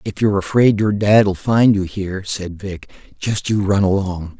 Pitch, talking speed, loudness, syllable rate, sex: 100 Hz, 190 wpm, -17 LUFS, 4.5 syllables/s, male